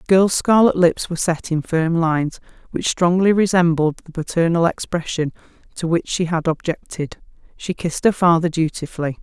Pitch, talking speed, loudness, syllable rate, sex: 170 Hz, 165 wpm, -19 LUFS, 5.3 syllables/s, female